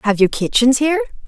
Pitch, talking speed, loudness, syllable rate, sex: 240 Hz, 190 wpm, -16 LUFS, 6.5 syllables/s, female